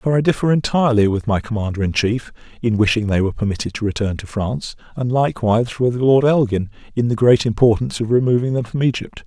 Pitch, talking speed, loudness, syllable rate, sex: 115 Hz, 205 wpm, -18 LUFS, 6.3 syllables/s, male